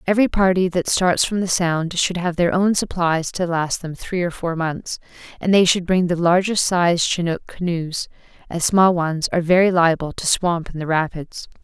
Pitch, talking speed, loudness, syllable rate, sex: 175 Hz, 200 wpm, -19 LUFS, 4.7 syllables/s, female